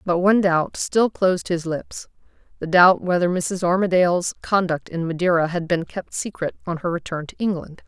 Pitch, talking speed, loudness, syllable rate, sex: 175 Hz, 175 wpm, -21 LUFS, 5.1 syllables/s, female